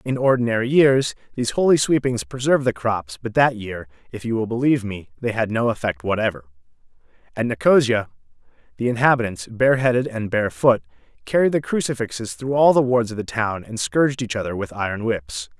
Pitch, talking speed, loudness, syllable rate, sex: 115 Hz, 185 wpm, -20 LUFS, 5.8 syllables/s, male